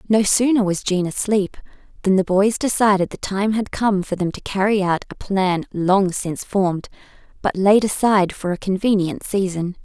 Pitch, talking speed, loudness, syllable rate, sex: 195 Hz, 185 wpm, -19 LUFS, 4.9 syllables/s, female